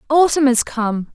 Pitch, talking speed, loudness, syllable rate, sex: 260 Hz, 155 wpm, -16 LUFS, 4.2 syllables/s, female